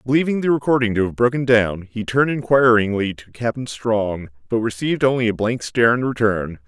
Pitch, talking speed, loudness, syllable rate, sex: 115 Hz, 190 wpm, -19 LUFS, 5.7 syllables/s, male